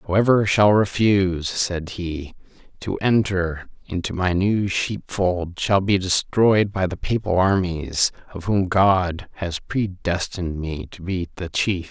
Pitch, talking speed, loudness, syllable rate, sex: 95 Hz, 140 wpm, -21 LUFS, 3.7 syllables/s, male